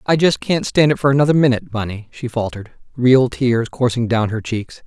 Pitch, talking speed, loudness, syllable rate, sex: 125 Hz, 210 wpm, -17 LUFS, 5.6 syllables/s, male